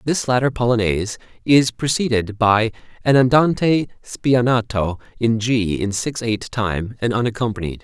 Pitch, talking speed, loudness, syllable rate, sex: 115 Hz, 130 wpm, -19 LUFS, 4.7 syllables/s, male